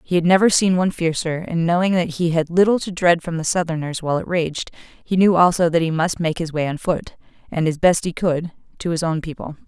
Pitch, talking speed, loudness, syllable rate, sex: 170 Hz, 250 wpm, -19 LUFS, 5.9 syllables/s, female